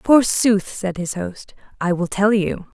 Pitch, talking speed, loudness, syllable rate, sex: 195 Hz, 170 wpm, -19 LUFS, 3.7 syllables/s, female